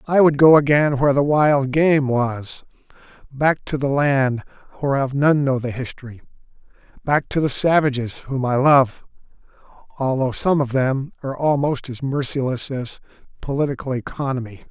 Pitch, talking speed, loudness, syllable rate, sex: 135 Hz, 145 wpm, -19 LUFS, 4.8 syllables/s, male